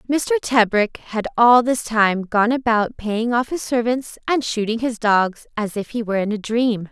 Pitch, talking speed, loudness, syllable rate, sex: 230 Hz, 200 wpm, -19 LUFS, 4.4 syllables/s, female